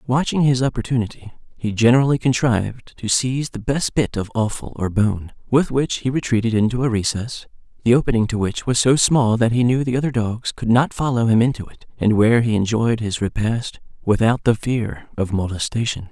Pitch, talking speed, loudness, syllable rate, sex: 115 Hz, 195 wpm, -19 LUFS, 5.5 syllables/s, male